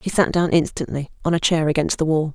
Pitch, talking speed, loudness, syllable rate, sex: 160 Hz, 255 wpm, -20 LUFS, 6.0 syllables/s, female